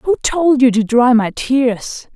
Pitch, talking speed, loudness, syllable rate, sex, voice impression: 250 Hz, 195 wpm, -14 LUFS, 3.6 syllables/s, female, very feminine, adult-like, slightly middle-aged, thin, relaxed, weak, slightly dark, soft, slightly clear, slightly fluent, cute, intellectual, slightly refreshing, very sincere, very calm, friendly, very reassuring, unique, elegant, sweet, very kind, very modest